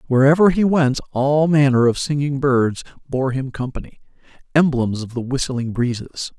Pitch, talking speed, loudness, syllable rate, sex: 135 Hz, 150 wpm, -18 LUFS, 4.8 syllables/s, male